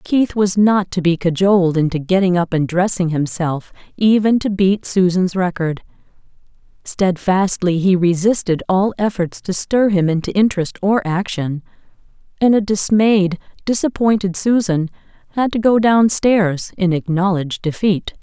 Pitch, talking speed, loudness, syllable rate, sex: 190 Hz, 135 wpm, -16 LUFS, 4.5 syllables/s, female